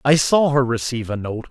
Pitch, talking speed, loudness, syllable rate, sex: 130 Hz, 240 wpm, -19 LUFS, 5.8 syllables/s, male